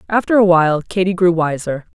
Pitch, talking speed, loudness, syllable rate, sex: 175 Hz, 185 wpm, -15 LUFS, 6.0 syllables/s, female